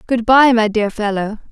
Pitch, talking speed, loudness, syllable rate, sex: 225 Hz, 200 wpm, -14 LUFS, 4.7 syllables/s, female